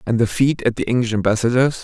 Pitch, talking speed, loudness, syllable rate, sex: 120 Hz, 230 wpm, -18 LUFS, 7.1 syllables/s, male